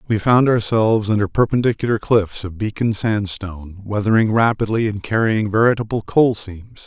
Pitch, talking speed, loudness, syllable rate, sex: 105 Hz, 140 wpm, -18 LUFS, 5.1 syllables/s, male